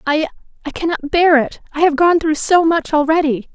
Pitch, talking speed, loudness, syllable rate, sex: 310 Hz, 185 wpm, -15 LUFS, 5.4 syllables/s, female